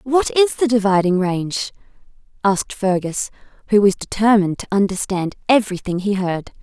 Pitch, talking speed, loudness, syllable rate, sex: 205 Hz, 135 wpm, -18 LUFS, 5.4 syllables/s, female